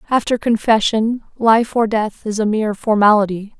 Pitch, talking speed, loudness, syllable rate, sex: 220 Hz, 150 wpm, -16 LUFS, 4.9 syllables/s, female